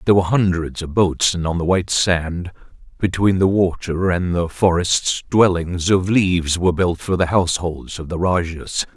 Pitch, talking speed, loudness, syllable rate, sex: 90 Hz, 180 wpm, -18 LUFS, 4.9 syllables/s, male